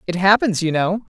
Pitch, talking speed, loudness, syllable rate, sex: 190 Hz, 200 wpm, -18 LUFS, 5.3 syllables/s, female